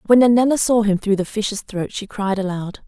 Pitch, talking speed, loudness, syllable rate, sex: 210 Hz, 230 wpm, -19 LUFS, 5.2 syllables/s, female